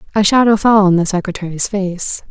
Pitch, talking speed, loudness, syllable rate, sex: 195 Hz, 180 wpm, -14 LUFS, 5.6 syllables/s, female